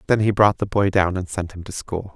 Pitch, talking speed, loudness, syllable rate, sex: 95 Hz, 305 wpm, -21 LUFS, 5.6 syllables/s, male